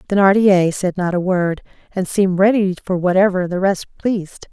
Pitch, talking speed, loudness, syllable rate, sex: 190 Hz, 175 wpm, -17 LUFS, 5.0 syllables/s, female